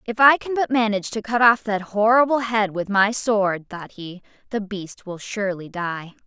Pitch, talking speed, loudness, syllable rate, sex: 210 Hz, 200 wpm, -20 LUFS, 4.8 syllables/s, female